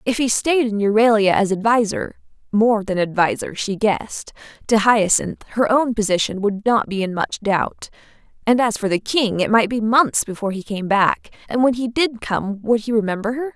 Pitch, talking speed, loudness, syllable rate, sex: 220 Hz, 190 wpm, -19 LUFS, 5.0 syllables/s, female